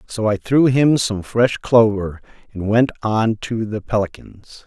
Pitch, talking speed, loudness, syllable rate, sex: 110 Hz, 165 wpm, -18 LUFS, 3.9 syllables/s, male